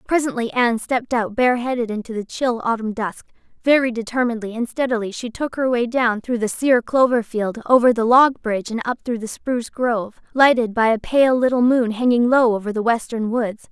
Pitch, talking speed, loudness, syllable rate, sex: 235 Hz, 200 wpm, -19 LUFS, 5.6 syllables/s, female